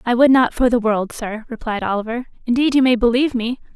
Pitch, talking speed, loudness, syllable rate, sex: 240 Hz, 225 wpm, -18 LUFS, 6.1 syllables/s, female